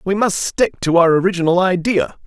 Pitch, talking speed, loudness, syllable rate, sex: 180 Hz, 185 wpm, -16 LUFS, 5.2 syllables/s, male